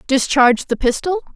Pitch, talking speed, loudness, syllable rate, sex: 275 Hz, 135 wpm, -16 LUFS, 5.4 syllables/s, female